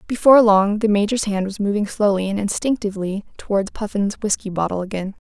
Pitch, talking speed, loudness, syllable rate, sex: 205 Hz, 170 wpm, -19 LUFS, 6.0 syllables/s, female